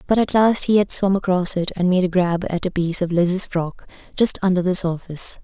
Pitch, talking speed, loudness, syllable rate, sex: 185 Hz, 245 wpm, -19 LUFS, 5.4 syllables/s, female